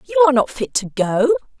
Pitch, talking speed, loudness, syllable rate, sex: 285 Hz, 225 wpm, -17 LUFS, 6.1 syllables/s, female